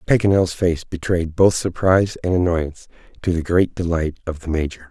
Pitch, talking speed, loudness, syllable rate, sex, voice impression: 85 Hz, 170 wpm, -20 LUFS, 5.3 syllables/s, male, very masculine, old, very thick, slightly relaxed, very powerful, dark, soft, muffled, fluent, cool, very intellectual, slightly refreshing, sincere, very calm, very mature, friendly, reassuring, unique, elegant, very wild, sweet, slightly lively, very kind, modest